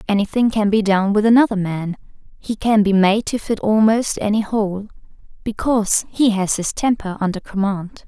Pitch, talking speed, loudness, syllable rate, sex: 210 Hz, 155 wpm, -18 LUFS, 5.0 syllables/s, female